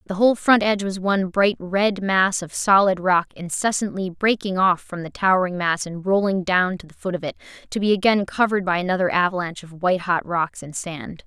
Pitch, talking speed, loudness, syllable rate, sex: 185 Hz, 215 wpm, -21 LUFS, 5.6 syllables/s, female